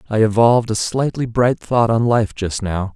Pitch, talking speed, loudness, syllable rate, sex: 110 Hz, 205 wpm, -17 LUFS, 4.7 syllables/s, male